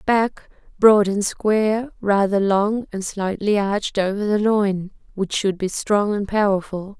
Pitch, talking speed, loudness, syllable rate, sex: 205 Hz, 145 wpm, -20 LUFS, 4.0 syllables/s, female